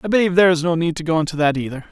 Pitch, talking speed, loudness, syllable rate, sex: 165 Hz, 345 wpm, -18 LUFS, 9.0 syllables/s, male